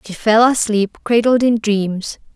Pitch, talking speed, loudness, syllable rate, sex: 220 Hz, 155 wpm, -15 LUFS, 4.0 syllables/s, female